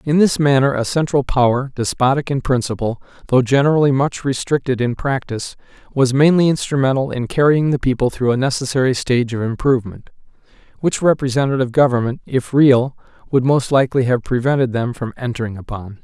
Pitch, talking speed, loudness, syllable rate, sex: 130 Hz, 155 wpm, -17 LUFS, 5.9 syllables/s, male